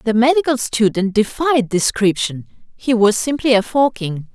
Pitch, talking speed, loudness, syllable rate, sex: 230 Hz, 140 wpm, -17 LUFS, 4.6 syllables/s, female